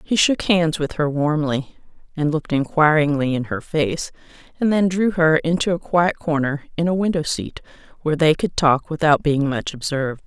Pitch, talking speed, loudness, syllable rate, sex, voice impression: 155 Hz, 185 wpm, -20 LUFS, 5.0 syllables/s, female, very feminine, adult-like, slightly middle-aged, very thin, tensed, slightly powerful, bright, hard, very clear, very fluent, slightly raspy, cool, very intellectual, refreshing, very sincere, calm, slightly friendly, reassuring, very unique, very elegant, slightly sweet, lively, slightly kind, strict, sharp